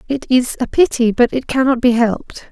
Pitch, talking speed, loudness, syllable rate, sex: 250 Hz, 215 wpm, -15 LUFS, 5.3 syllables/s, female